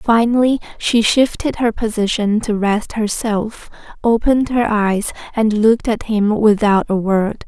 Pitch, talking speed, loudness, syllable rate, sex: 220 Hz, 145 wpm, -16 LUFS, 4.2 syllables/s, female